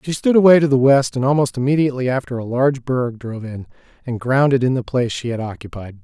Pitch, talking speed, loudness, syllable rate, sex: 130 Hz, 230 wpm, -17 LUFS, 6.5 syllables/s, male